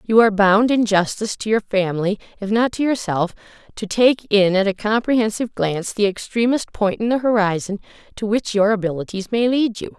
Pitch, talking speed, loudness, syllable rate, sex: 210 Hz, 190 wpm, -19 LUFS, 5.6 syllables/s, female